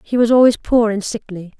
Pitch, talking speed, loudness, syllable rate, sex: 220 Hz, 225 wpm, -15 LUFS, 5.5 syllables/s, female